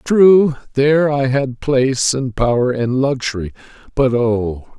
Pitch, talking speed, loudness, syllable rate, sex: 130 Hz, 140 wpm, -16 LUFS, 4.0 syllables/s, male